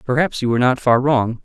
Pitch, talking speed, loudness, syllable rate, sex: 125 Hz, 250 wpm, -17 LUFS, 6.1 syllables/s, male